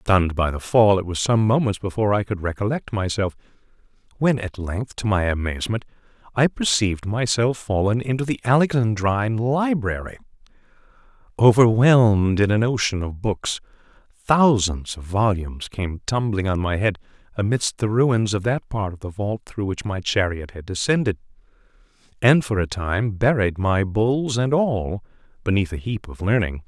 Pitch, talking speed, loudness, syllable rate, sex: 105 Hz, 155 wpm, -21 LUFS, 5.0 syllables/s, male